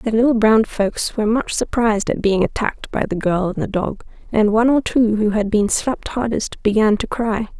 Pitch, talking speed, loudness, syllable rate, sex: 215 Hz, 220 wpm, -18 LUFS, 5.3 syllables/s, female